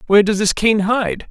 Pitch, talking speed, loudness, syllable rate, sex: 200 Hz, 230 wpm, -16 LUFS, 5.2 syllables/s, male